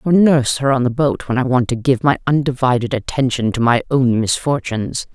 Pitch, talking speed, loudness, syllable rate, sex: 130 Hz, 210 wpm, -16 LUFS, 5.6 syllables/s, female